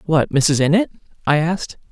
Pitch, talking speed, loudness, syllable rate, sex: 160 Hz, 155 wpm, -18 LUFS, 5.5 syllables/s, female